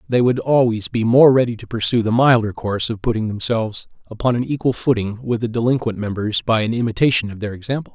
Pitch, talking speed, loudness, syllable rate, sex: 115 Hz, 210 wpm, -18 LUFS, 6.2 syllables/s, male